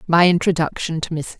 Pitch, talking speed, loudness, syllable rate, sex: 165 Hz, 170 wpm, -19 LUFS, 5.7 syllables/s, female